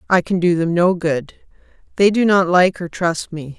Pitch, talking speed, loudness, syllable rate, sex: 175 Hz, 200 wpm, -17 LUFS, 4.5 syllables/s, female